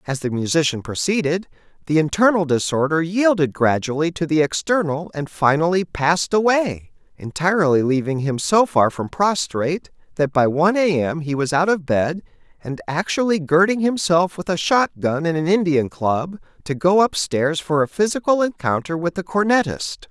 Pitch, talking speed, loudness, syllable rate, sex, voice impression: 165 Hz, 165 wpm, -19 LUFS, 5.0 syllables/s, male, masculine, adult-like, cool, sincere, friendly